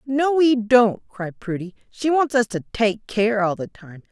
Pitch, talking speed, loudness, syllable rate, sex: 225 Hz, 205 wpm, -20 LUFS, 4.1 syllables/s, female